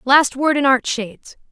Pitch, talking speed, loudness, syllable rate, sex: 265 Hz, 200 wpm, -17 LUFS, 4.6 syllables/s, female